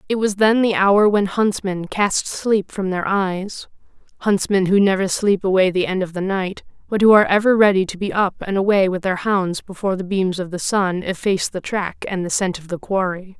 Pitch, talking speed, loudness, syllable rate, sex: 190 Hz, 220 wpm, -19 LUFS, 5.1 syllables/s, female